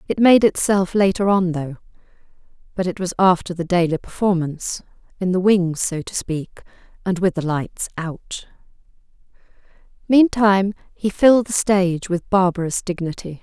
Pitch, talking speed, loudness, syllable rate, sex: 185 Hz, 140 wpm, -19 LUFS, 4.9 syllables/s, female